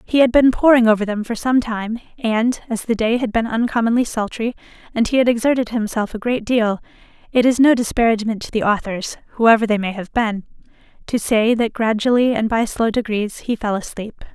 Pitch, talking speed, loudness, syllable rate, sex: 225 Hz, 200 wpm, -18 LUFS, 5.5 syllables/s, female